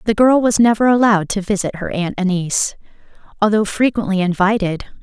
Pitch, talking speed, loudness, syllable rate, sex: 205 Hz, 155 wpm, -16 LUFS, 5.9 syllables/s, female